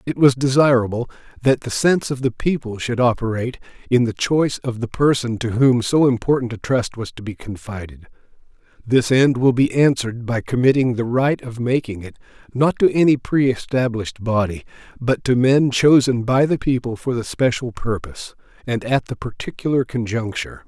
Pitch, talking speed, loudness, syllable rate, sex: 120 Hz, 175 wpm, -19 LUFS, 5.3 syllables/s, male